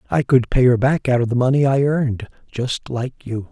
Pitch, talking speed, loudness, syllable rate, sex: 130 Hz, 240 wpm, -18 LUFS, 5.4 syllables/s, male